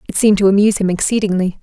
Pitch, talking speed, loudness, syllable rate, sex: 200 Hz, 220 wpm, -14 LUFS, 8.4 syllables/s, female